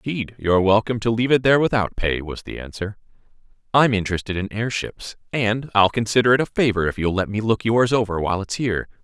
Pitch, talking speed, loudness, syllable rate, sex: 110 Hz, 215 wpm, -20 LUFS, 6.4 syllables/s, male